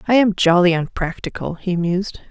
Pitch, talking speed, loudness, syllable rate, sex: 185 Hz, 155 wpm, -18 LUFS, 5.3 syllables/s, female